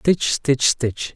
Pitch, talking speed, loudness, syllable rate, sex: 130 Hz, 155 wpm, -19 LUFS, 2.7 syllables/s, male